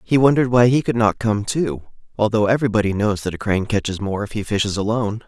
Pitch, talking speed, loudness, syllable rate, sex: 110 Hz, 230 wpm, -19 LUFS, 6.6 syllables/s, male